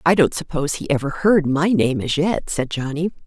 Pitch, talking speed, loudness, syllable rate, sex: 155 Hz, 220 wpm, -20 LUFS, 5.3 syllables/s, female